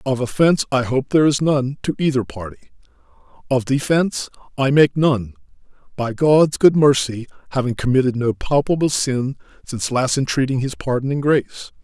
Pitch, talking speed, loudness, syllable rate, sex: 130 Hz, 145 wpm, -18 LUFS, 5.4 syllables/s, male